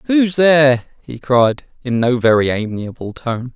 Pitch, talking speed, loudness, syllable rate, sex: 130 Hz, 150 wpm, -15 LUFS, 4.2 syllables/s, male